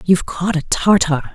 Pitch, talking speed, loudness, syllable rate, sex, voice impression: 175 Hz, 180 wpm, -16 LUFS, 4.8 syllables/s, female, very feminine, middle-aged, intellectual, slightly calm, slightly elegant